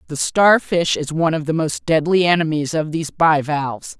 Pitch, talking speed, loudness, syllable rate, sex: 160 Hz, 180 wpm, -18 LUFS, 5.3 syllables/s, female